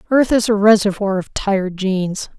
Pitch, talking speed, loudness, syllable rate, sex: 205 Hz, 175 wpm, -17 LUFS, 5.2 syllables/s, female